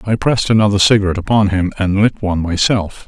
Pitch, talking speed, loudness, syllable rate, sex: 100 Hz, 195 wpm, -14 LUFS, 6.6 syllables/s, male